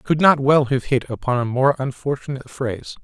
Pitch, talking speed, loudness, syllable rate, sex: 130 Hz, 215 wpm, -20 LUFS, 6.1 syllables/s, male